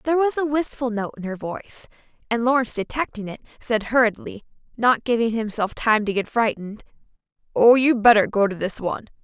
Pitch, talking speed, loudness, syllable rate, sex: 230 Hz, 180 wpm, -21 LUFS, 5.8 syllables/s, female